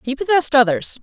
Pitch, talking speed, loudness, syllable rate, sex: 275 Hz, 175 wpm, -16 LUFS, 6.5 syllables/s, female